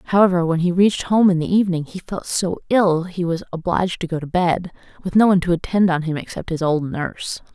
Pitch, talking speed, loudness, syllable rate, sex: 175 Hz, 240 wpm, -19 LUFS, 5.9 syllables/s, female